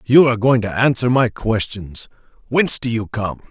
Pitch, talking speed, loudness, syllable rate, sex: 115 Hz, 190 wpm, -17 LUFS, 5.2 syllables/s, male